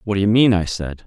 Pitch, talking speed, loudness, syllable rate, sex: 100 Hz, 340 wpm, -17 LUFS, 6.2 syllables/s, male